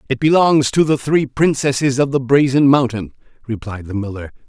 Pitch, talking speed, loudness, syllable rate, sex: 130 Hz, 175 wpm, -16 LUFS, 5.3 syllables/s, male